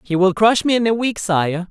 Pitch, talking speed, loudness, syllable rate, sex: 200 Hz, 280 wpm, -17 LUFS, 5.0 syllables/s, male